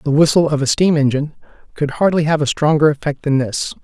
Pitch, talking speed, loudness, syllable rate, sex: 150 Hz, 220 wpm, -16 LUFS, 6.0 syllables/s, male